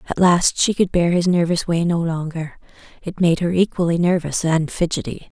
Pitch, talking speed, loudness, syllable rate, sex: 170 Hz, 190 wpm, -19 LUFS, 5.1 syllables/s, female